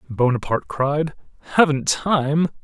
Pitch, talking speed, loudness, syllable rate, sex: 145 Hz, 90 wpm, -20 LUFS, 4.2 syllables/s, male